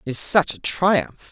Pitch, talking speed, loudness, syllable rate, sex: 170 Hz, 225 wpm, -19 LUFS, 4.7 syllables/s, female